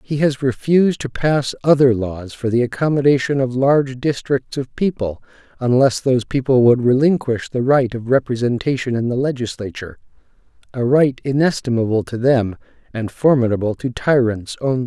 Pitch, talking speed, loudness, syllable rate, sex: 125 Hz, 150 wpm, -18 LUFS, 5.2 syllables/s, male